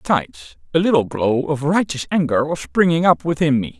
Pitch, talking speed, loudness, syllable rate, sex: 145 Hz, 190 wpm, -18 LUFS, 5.4 syllables/s, male